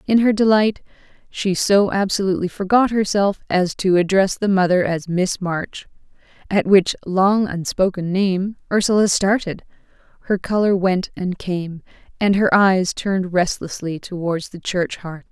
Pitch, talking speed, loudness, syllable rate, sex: 190 Hz, 150 wpm, -19 LUFS, 4.5 syllables/s, female